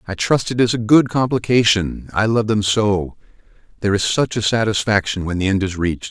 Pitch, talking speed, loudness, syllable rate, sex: 105 Hz, 185 wpm, -17 LUFS, 5.5 syllables/s, male